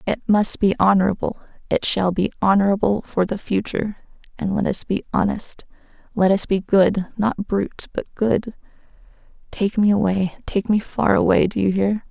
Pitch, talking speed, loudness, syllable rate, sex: 200 Hz, 170 wpm, -20 LUFS, 4.9 syllables/s, female